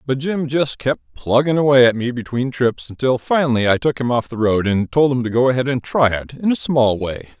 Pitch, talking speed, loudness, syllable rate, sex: 125 Hz, 250 wpm, -18 LUFS, 5.3 syllables/s, male